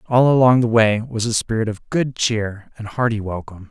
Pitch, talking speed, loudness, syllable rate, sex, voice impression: 115 Hz, 210 wpm, -18 LUFS, 5.1 syllables/s, male, masculine, very adult-like, slightly muffled, sincere, slightly friendly, slightly unique